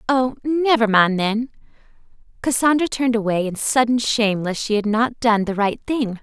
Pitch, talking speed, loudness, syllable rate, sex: 230 Hz, 175 wpm, -19 LUFS, 4.9 syllables/s, female